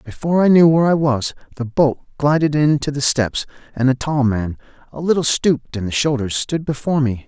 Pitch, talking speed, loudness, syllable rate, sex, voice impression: 140 Hz, 215 wpm, -17 LUFS, 5.8 syllables/s, male, very masculine, very adult-like, very middle-aged, very thick, tensed, very powerful, slightly dark, slightly hard, slightly muffled, fluent, very cool, intellectual, very sincere, very calm, mature, very friendly, very reassuring, unique, slightly elegant, wild, slightly sweet, slightly lively, kind